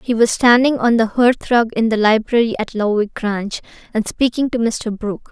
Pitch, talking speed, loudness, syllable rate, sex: 225 Hz, 205 wpm, -16 LUFS, 5.2 syllables/s, female